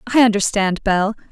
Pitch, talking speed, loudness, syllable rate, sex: 210 Hz, 135 wpm, -17 LUFS, 4.8 syllables/s, female